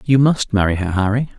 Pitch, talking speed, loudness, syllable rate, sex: 115 Hz, 215 wpm, -17 LUFS, 5.7 syllables/s, male